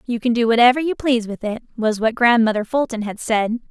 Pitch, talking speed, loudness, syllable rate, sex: 230 Hz, 225 wpm, -18 LUFS, 6.0 syllables/s, female